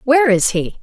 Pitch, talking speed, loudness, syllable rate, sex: 245 Hz, 215 wpm, -14 LUFS, 5.5 syllables/s, female